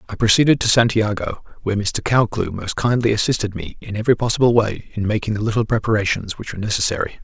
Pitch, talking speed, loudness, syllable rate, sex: 110 Hz, 190 wpm, -19 LUFS, 6.6 syllables/s, male